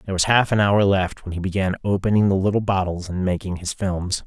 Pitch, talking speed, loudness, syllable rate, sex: 95 Hz, 240 wpm, -21 LUFS, 5.9 syllables/s, male